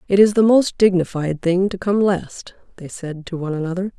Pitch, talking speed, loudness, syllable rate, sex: 185 Hz, 210 wpm, -18 LUFS, 5.4 syllables/s, female